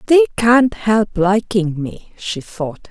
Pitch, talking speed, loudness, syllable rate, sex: 210 Hz, 145 wpm, -16 LUFS, 3.1 syllables/s, female